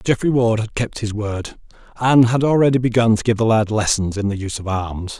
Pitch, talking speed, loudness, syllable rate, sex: 110 Hz, 230 wpm, -18 LUFS, 5.5 syllables/s, male